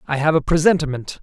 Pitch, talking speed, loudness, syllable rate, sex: 150 Hz, 195 wpm, -18 LUFS, 6.5 syllables/s, male